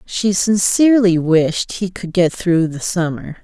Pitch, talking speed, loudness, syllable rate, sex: 185 Hz, 155 wpm, -16 LUFS, 4.0 syllables/s, female